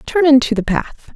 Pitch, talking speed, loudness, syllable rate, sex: 270 Hz, 210 wpm, -15 LUFS, 4.5 syllables/s, female